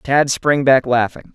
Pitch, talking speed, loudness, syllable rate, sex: 135 Hz, 180 wpm, -16 LUFS, 3.8 syllables/s, male